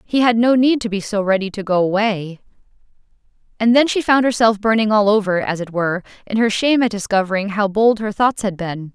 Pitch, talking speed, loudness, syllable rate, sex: 210 Hz, 220 wpm, -17 LUFS, 5.8 syllables/s, female